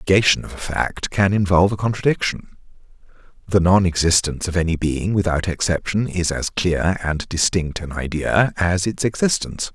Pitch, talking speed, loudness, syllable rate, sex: 90 Hz, 165 wpm, -19 LUFS, 5.3 syllables/s, male